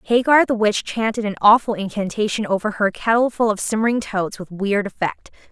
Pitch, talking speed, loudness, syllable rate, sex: 215 Hz, 175 wpm, -19 LUFS, 5.4 syllables/s, female